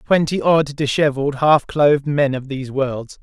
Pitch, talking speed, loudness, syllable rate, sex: 140 Hz, 165 wpm, -18 LUFS, 4.9 syllables/s, male